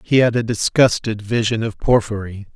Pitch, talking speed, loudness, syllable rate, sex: 110 Hz, 165 wpm, -18 LUFS, 5.0 syllables/s, male